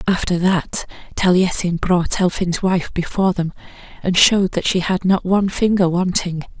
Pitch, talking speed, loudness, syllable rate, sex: 180 Hz, 155 wpm, -18 LUFS, 4.9 syllables/s, female